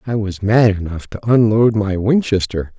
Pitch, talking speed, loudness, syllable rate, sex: 105 Hz, 175 wpm, -16 LUFS, 4.6 syllables/s, male